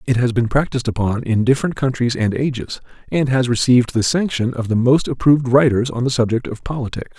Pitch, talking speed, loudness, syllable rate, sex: 125 Hz, 210 wpm, -18 LUFS, 6.0 syllables/s, male